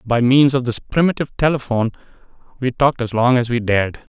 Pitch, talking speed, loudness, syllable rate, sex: 125 Hz, 190 wpm, -17 LUFS, 6.4 syllables/s, male